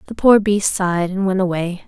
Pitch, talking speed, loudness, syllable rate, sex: 190 Hz, 225 wpm, -17 LUFS, 5.3 syllables/s, female